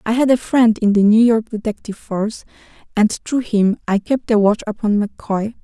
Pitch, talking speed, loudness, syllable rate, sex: 220 Hz, 200 wpm, -17 LUFS, 5.2 syllables/s, female